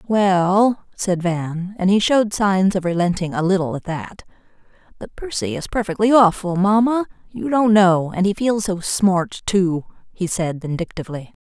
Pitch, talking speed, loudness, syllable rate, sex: 190 Hz, 165 wpm, -19 LUFS, 4.6 syllables/s, female